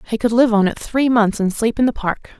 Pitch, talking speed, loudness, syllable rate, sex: 225 Hz, 300 wpm, -17 LUFS, 5.6 syllables/s, female